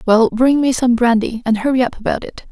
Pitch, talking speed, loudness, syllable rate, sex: 240 Hz, 240 wpm, -15 LUFS, 5.7 syllables/s, female